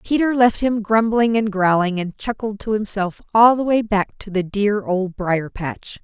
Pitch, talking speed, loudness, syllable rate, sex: 210 Hz, 200 wpm, -19 LUFS, 4.4 syllables/s, female